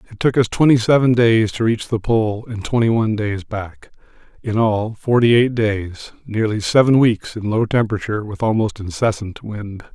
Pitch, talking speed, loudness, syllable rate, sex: 110 Hz, 170 wpm, -18 LUFS, 4.9 syllables/s, male